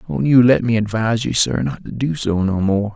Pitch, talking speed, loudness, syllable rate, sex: 115 Hz, 265 wpm, -17 LUFS, 5.4 syllables/s, male